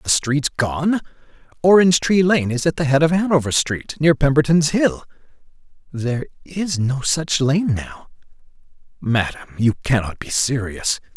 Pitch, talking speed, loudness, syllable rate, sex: 145 Hz, 150 wpm, -18 LUFS, 4.8 syllables/s, male